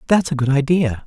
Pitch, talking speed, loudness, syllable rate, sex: 145 Hz, 225 wpm, -18 LUFS, 5.8 syllables/s, male